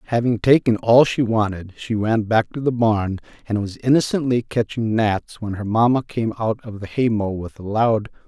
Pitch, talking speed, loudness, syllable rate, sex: 110 Hz, 205 wpm, -20 LUFS, 4.8 syllables/s, male